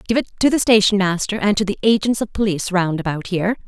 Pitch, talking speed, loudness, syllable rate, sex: 200 Hz, 245 wpm, -18 LUFS, 6.7 syllables/s, female